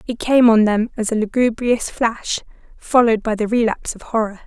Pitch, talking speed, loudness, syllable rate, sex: 225 Hz, 190 wpm, -18 LUFS, 5.4 syllables/s, female